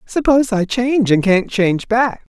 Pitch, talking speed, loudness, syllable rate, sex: 220 Hz, 180 wpm, -16 LUFS, 5.1 syllables/s, female